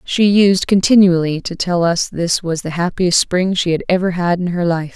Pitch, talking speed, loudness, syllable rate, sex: 175 Hz, 220 wpm, -15 LUFS, 4.8 syllables/s, female